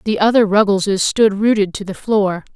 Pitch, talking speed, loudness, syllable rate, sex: 205 Hz, 190 wpm, -15 LUFS, 5.1 syllables/s, female